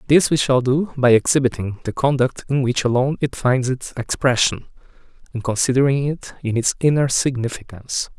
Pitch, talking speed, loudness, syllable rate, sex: 130 Hz, 160 wpm, -19 LUFS, 5.5 syllables/s, male